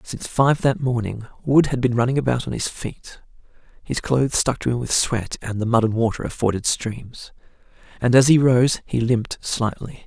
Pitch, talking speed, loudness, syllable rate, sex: 125 Hz, 205 wpm, -20 LUFS, 5.1 syllables/s, male